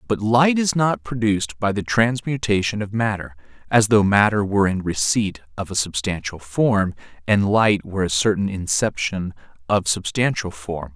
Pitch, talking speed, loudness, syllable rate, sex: 105 Hz, 160 wpm, -20 LUFS, 4.8 syllables/s, male